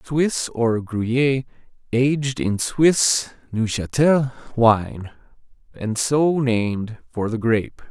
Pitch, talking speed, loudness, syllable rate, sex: 125 Hz, 105 wpm, -20 LUFS, 3.3 syllables/s, male